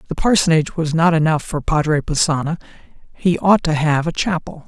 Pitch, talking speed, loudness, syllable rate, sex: 160 Hz, 180 wpm, -17 LUFS, 5.7 syllables/s, male